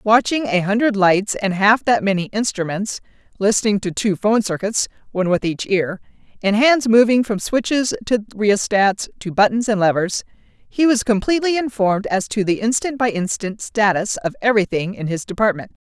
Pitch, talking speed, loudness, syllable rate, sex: 210 Hz, 170 wpm, -18 LUFS, 5.2 syllables/s, female